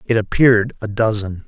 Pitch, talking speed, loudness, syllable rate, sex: 110 Hz, 165 wpm, -17 LUFS, 5.4 syllables/s, male